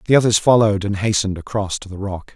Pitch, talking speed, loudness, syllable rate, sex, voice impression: 100 Hz, 230 wpm, -18 LUFS, 6.9 syllables/s, male, very masculine, very middle-aged, very thick, very tensed, slightly weak, dark, soft, muffled, fluent, raspy, very cool, intellectual, slightly refreshing, sincere, calm, very mature, friendly, very reassuring, unique, slightly elegant, wild, slightly sweet, lively, kind, intense